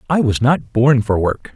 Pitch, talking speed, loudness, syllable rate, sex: 125 Hz, 230 wpm, -16 LUFS, 4.4 syllables/s, male